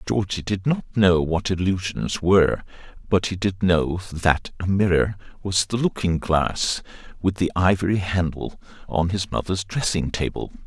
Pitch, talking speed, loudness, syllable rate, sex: 95 Hz, 150 wpm, -22 LUFS, 4.5 syllables/s, male